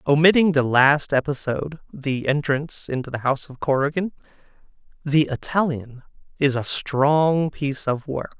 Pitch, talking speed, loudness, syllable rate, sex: 145 Hz, 135 wpm, -21 LUFS, 4.8 syllables/s, male